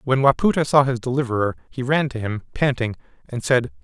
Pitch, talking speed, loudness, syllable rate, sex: 130 Hz, 190 wpm, -21 LUFS, 5.8 syllables/s, male